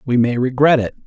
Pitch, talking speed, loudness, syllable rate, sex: 130 Hz, 225 wpm, -16 LUFS, 5.9 syllables/s, male